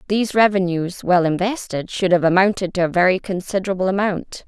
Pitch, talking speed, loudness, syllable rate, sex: 185 Hz, 160 wpm, -19 LUFS, 5.9 syllables/s, female